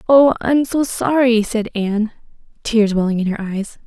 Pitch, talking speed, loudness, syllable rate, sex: 225 Hz, 170 wpm, -17 LUFS, 4.9 syllables/s, female